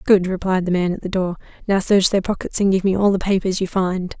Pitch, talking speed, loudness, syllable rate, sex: 190 Hz, 270 wpm, -19 LUFS, 5.9 syllables/s, female